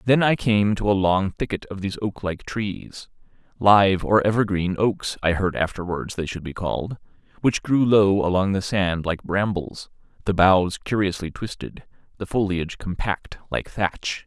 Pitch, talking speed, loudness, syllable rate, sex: 100 Hz, 155 wpm, -22 LUFS, 4.6 syllables/s, male